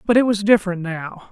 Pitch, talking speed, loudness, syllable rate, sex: 195 Hz, 225 wpm, -18 LUFS, 5.8 syllables/s, male